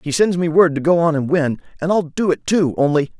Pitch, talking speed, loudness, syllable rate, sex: 160 Hz, 280 wpm, -17 LUFS, 5.6 syllables/s, male